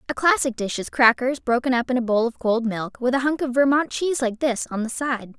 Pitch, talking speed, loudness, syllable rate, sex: 250 Hz, 270 wpm, -22 LUFS, 5.6 syllables/s, female